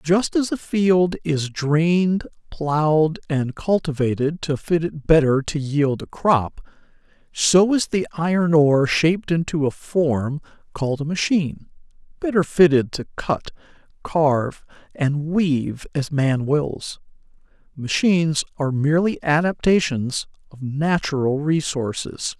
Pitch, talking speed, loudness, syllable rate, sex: 155 Hz, 125 wpm, -20 LUFS, 4.2 syllables/s, male